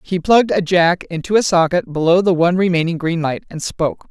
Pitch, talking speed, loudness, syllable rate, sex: 175 Hz, 220 wpm, -16 LUFS, 5.9 syllables/s, female